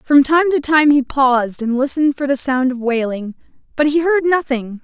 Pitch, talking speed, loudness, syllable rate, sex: 275 Hz, 210 wpm, -16 LUFS, 5.0 syllables/s, female